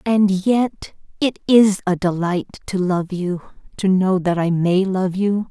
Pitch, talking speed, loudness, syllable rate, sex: 190 Hz, 175 wpm, -19 LUFS, 3.8 syllables/s, female